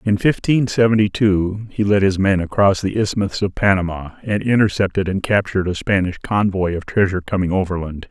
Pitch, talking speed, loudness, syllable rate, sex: 100 Hz, 180 wpm, -18 LUFS, 5.5 syllables/s, male